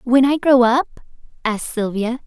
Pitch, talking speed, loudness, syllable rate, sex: 250 Hz, 160 wpm, -17 LUFS, 4.8 syllables/s, female